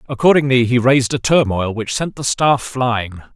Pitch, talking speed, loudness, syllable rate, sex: 125 Hz, 180 wpm, -16 LUFS, 4.9 syllables/s, male